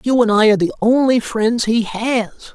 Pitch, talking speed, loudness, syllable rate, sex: 230 Hz, 210 wpm, -16 LUFS, 4.7 syllables/s, male